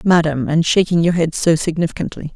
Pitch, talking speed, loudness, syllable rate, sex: 165 Hz, 180 wpm, -17 LUFS, 5.8 syllables/s, female